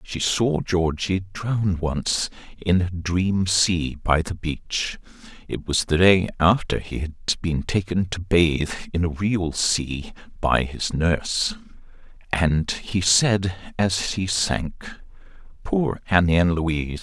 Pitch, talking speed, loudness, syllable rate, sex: 90 Hz, 135 wpm, -22 LUFS, 1.7 syllables/s, male